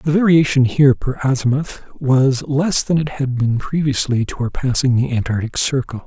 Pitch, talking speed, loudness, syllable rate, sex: 135 Hz, 180 wpm, -17 LUFS, 4.8 syllables/s, male